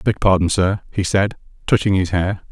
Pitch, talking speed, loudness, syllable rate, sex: 95 Hz, 190 wpm, -18 LUFS, 5.1 syllables/s, male